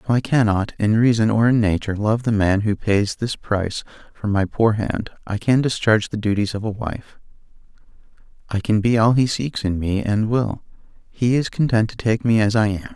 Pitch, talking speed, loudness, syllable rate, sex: 110 Hz, 215 wpm, -20 LUFS, 5.2 syllables/s, male